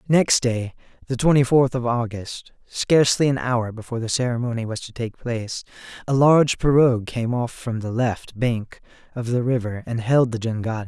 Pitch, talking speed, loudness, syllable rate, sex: 120 Hz, 180 wpm, -21 LUFS, 5.3 syllables/s, male